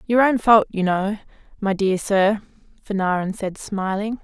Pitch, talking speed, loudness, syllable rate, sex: 205 Hz, 155 wpm, -20 LUFS, 4.4 syllables/s, female